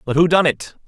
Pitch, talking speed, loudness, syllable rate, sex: 150 Hz, 275 wpm, -16 LUFS, 6.0 syllables/s, male